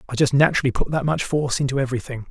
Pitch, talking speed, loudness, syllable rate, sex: 135 Hz, 235 wpm, -21 LUFS, 8.1 syllables/s, male